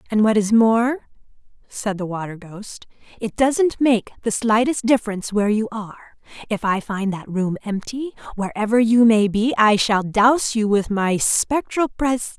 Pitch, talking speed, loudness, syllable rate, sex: 220 Hz, 170 wpm, -19 LUFS, 4.6 syllables/s, female